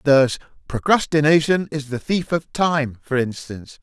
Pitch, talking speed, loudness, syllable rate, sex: 145 Hz, 140 wpm, -20 LUFS, 4.8 syllables/s, male